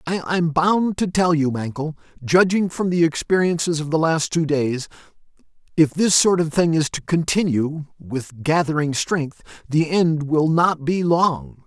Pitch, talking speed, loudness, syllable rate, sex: 160 Hz, 160 wpm, -20 LUFS, 4.3 syllables/s, male